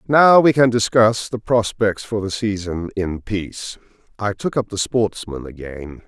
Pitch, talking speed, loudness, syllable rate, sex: 105 Hz, 170 wpm, -19 LUFS, 4.2 syllables/s, male